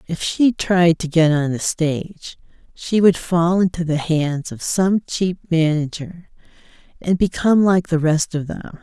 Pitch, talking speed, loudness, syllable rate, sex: 170 Hz, 170 wpm, -18 LUFS, 4.2 syllables/s, female